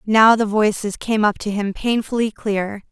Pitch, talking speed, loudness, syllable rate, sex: 210 Hz, 185 wpm, -19 LUFS, 4.5 syllables/s, female